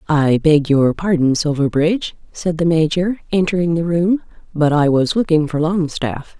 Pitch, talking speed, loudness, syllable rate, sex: 160 Hz, 160 wpm, -16 LUFS, 4.6 syllables/s, female